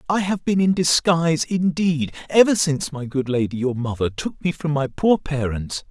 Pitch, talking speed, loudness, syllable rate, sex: 155 Hz, 195 wpm, -21 LUFS, 4.9 syllables/s, male